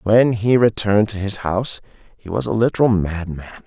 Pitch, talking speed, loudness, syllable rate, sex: 105 Hz, 180 wpm, -18 LUFS, 5.6 syllables/s, male